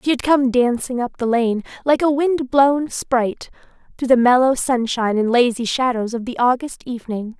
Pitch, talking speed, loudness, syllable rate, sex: 250 Hz, 185 wpm, -18 LUFS, 5.1 syllables/s, female